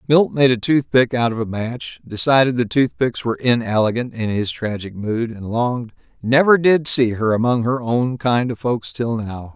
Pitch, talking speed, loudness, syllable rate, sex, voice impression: 120 Hz, 195 wpm, -18 LUFS, 4.7 syllables/s, male, very masculine, very adult-like, slightly old, very thick, slightly tensed, slightly powerful, bright, slightly hard, slightly muffled, fluent, slightly raspy, cool, very intellectual, sincere, very calm, very mature, friendly, very reassuring, very unique, slightly elegant, wild, slightly sweet, lively, kind, slightly intense, slightly modest